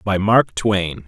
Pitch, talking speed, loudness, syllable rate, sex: 100 Hz, 170 wpm, -17 LUFS, 3.1 syllables/s, male